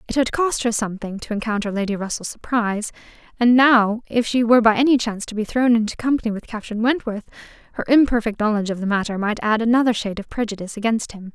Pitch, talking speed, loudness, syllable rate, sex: 225 Hz, 210 wpm, -20 LUFS, 6.7 syllables/s, female